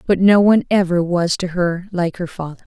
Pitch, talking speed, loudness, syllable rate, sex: 180 Hz, 220 wpm, -17 LUFS, 5.4 syllables/s, female